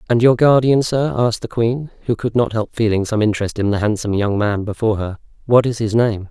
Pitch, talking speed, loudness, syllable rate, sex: 115 Hz, 240 wpm, -17 LUFS, 6.0 syllables/s, male